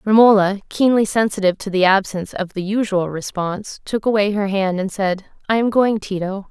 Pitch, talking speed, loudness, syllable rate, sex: 200 Hz, 185 wpm, -18 LUFS, 5.4 syllables/s, female